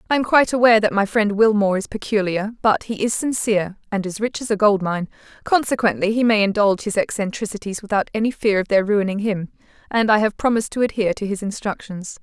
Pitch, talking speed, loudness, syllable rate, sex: 210 Hz, 210 wpm, -19 LUFS, 6.3 syllables/s, female